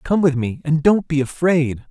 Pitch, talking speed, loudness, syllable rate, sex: 150 Hz, 220 wpm, -18 LUFS, 4.6 syllables/s, male